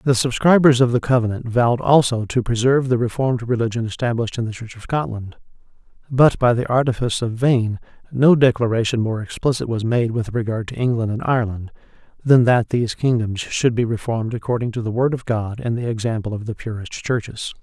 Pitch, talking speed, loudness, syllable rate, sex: 120 Hz, 190 wpm, -19 LUFS, 5.9 syllables/s, male